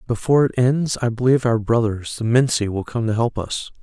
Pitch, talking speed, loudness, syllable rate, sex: 120 Hz, 220 wpm, -19 LUFS, 5.7 syllables/s, male